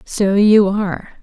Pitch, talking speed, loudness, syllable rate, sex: 200 Hz, 145 wpm, -14 LUFS, 4.0 syllables/s, female